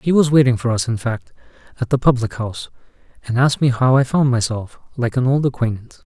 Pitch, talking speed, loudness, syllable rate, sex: 125 Hz, 215 wpm, -18 LUFS, 6.2 syllables/s, male